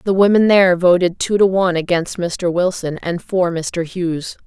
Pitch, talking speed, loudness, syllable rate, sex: 180 Hz, 190 wpm, -16 LUFS, 4.9 syllables/s, female